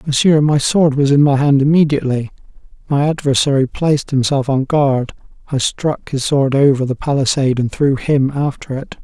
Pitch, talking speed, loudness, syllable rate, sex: 140 Hz, 175 wpm, -15 LUFS, 5.2 syllables/s, male